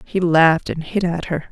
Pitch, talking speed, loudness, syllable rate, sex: 170 Hz, 235 wpm, -18 LUFS, 5.1 syllables/s, female